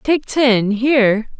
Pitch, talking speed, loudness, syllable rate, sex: 245 Hz, 130 wpm, -15 LUFS, 3.2 syllables/s, female